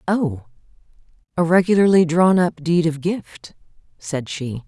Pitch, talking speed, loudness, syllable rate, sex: 165 Hz, 130 wpm, -18 LUFS, 4.1 syllables/s, female